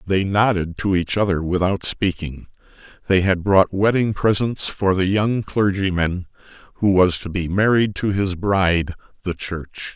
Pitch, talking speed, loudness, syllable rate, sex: 95 Hz, 150 wpm, -19 LUFS, 4.3 syllables/s, male